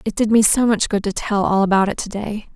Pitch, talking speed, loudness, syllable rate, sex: 210 Hz, 280 wpm, -18 LUFS, 5.7 syllables/s, female